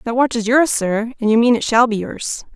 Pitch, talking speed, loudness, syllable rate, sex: 235 Hz, 280 wpm, -17 LUFS, 5.3 syllables/s, female